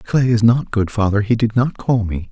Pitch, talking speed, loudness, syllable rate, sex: 110 Hz, 235 wpm, -17 LUFS, 4.9 syllables/s, male